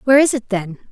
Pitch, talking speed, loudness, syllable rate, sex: 235 Hz, 265 wpm, -17 LUFS, 7.3 syllables/s, female